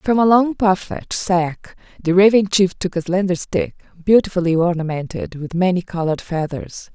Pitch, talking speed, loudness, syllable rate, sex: 180 Hz, 155 wpm, -18 LUFS, 5.1 syllables/s, female